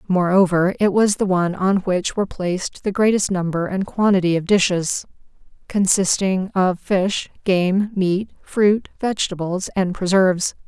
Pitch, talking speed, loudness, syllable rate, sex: 190 Hz, 140 wpm, -19 LUFS, 4.5 syllables/s, female